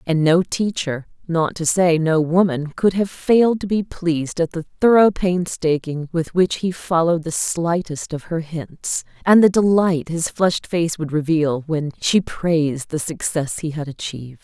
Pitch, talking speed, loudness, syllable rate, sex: 165 Hz, 180 wpm, -19 LUFS, 4.4 syllables/s, female